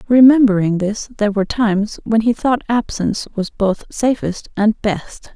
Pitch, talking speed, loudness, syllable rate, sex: 215 Hz, 155 wpm, -17 LUFS, 4.8 syllables/s, female